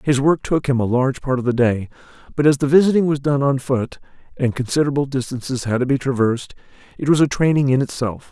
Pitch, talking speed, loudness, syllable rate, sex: 135 Hz, 225 wpm, -19 LUFS, 6.4 syllables/s, male